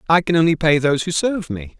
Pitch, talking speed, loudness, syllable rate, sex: 160 Hz, 265 wpm, -17 LUFS, 6.8 syllables/s, male